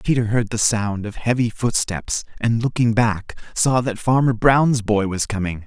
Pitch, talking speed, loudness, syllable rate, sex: 115 Hz, 180 wpm, -20 LUFS, 4.4 syllables/s, male